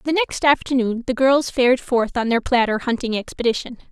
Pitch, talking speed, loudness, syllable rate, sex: 250 Hz, 185 wpm, -19 LUFS, 5.5 syllables/s, female